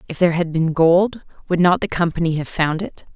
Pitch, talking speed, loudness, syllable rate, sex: 170 Hz, 230 wpm, -18 LUFS, 5.6 syllables/s, female